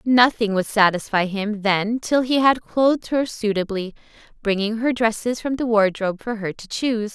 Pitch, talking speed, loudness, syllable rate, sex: 220 Hz, 175 wpm, -21 LUFS, 4.9 syllables/s, female